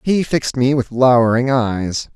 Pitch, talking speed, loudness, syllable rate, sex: 125 Hz, 165 wpm, -16 LUFS, 4.5 syllables/s, male